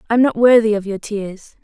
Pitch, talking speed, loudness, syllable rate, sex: 220 Hz, 255 wpm, -16 LUFS, 6.0 syllables/s, female